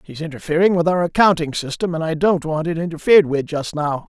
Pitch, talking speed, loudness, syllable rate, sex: 165 Hz, 215 wpm, -18 LUFS, 6.0 syllables/s, male